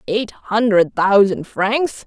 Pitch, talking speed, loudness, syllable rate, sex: 210 Hz, 115 wpm, -17 LUFS, 3.1 syllables/s, female